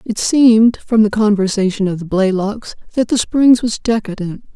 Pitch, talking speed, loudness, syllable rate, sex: 215 Hz, 170 wpm, -14 LUFS, 3.2 syllables/s, female